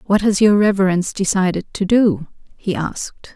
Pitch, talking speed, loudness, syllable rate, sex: 195 Hz, 160 wpm, -17 LUFS, 5.2 syllables/s, female